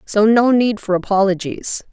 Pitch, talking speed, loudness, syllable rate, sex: 205 Hz, 155 wpm, -16 LUFS, 4.6 syllables/s, female